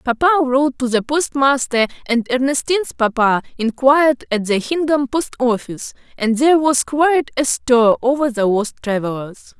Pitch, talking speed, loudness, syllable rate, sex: 265 Hz, 150 wpm, -17 LUFS, 5.0 syllables/s, female